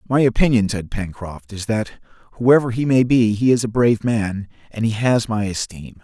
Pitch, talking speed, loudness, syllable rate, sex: 110 Hz, 200 wpm, -19 LUFS, 5.0 syllables/s, male